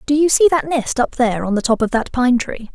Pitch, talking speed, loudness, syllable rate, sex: 255 Hz, 305 wpm, -16 LUFS, 5.8 syllables/s, female